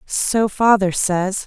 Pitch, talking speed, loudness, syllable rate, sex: 200 Hz, 125 wpm, -17 LUFS, 2.9 syllables/s, female